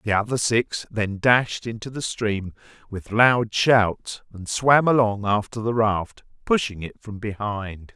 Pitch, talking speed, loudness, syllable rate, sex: 110 Hz, 160 wpm, -22 LUFS, 3.8 syllables/s, male